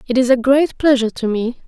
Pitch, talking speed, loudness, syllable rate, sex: 250 Hz, 250 wpm, -16 LUFS, 6.0 syllables/s, female